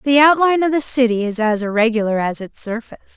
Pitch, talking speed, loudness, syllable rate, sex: 240 Hz, 210 wpm, -16 LUFS, 6.6 syllables/s, female